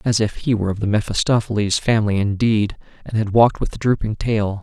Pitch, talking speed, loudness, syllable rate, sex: 105 Hz, 205 wpm, -19 LUFS, 6.1 syllables/s, male